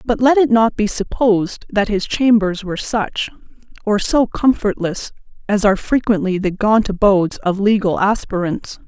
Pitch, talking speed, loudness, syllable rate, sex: 210 Hz, 155 wpm, -17 LUFS, 4.8 syllables/s, female